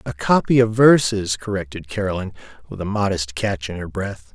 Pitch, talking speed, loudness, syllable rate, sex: 100 Hz, 180 wpm, -20 LUFS, 5.2 syllables/s, male